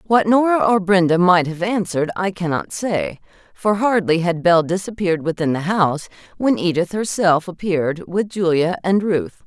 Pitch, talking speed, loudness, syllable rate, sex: 180 Hz, 165 wpm, -18 LUFS, 5.0 syllables/s, female